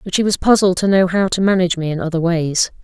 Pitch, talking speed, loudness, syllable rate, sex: 180 Hz, 275 wpm, -16 LUFS, 6.4 syllables/s, female